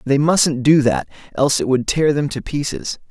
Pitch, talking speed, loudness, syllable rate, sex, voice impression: 140 Hz, 215 wpm, -17 LUFS, 5.0 syllables/s, male, very masculine, slightly young, very adult-like, very thick, tensed, very powerful, very bright, soft, very clear, fluent, very cool, intellectual, very refreshing, very sincere, slightly calm, very friendly, very reassuring, unique, elegant, slightly wild, sweet, very lively, very kind, intense, slightly modest